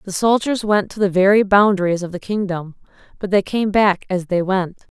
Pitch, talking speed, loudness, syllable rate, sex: 195 Hz, 205 wpm, -17 LUFS, 5.2 syllables/s, female